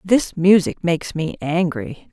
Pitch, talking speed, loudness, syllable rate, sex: 175 Hz, 140 wpm, -19 LUFS, 4.1 syllables/s, female